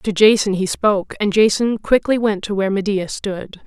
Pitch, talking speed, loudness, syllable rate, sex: 205 Hz, 195 wpm, -17 LUFS, 5.0 syllables/s, female